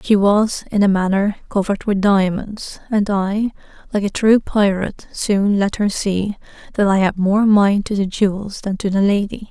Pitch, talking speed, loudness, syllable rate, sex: 200 Hz, 190 wpm, -17 LUFS, 4.6 syllables/s, female